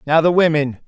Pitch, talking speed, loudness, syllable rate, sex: 155 Hz, 205 wpm, -16 LUFS, 5.6 syllables/s, male